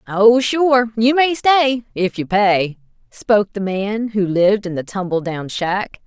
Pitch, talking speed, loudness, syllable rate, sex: 210 Hz, 170 wpm, -17 LUFS, 4.2 syllables/s, female